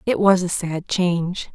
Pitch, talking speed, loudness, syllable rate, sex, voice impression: 180 Hz, 195 wpm, -20 LUFS, 4.3 syllables/s, female, feminine, adult-like, tensed, bright, slightly soft, slightly muffled, intellectual, calm, reassuring, elegant, slightly modest